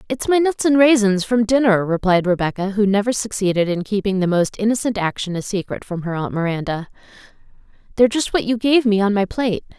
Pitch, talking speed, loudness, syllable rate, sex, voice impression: 210 Hz, 200 wpm, -18 LUFS, 6.0 syllables/s, female, feminine, adult-like, slightly powerful, bright, slightly soft, intellectual, friendly, unique, slightly elegant, slightly sweet, slightly strict, slightly intense, slightly sharp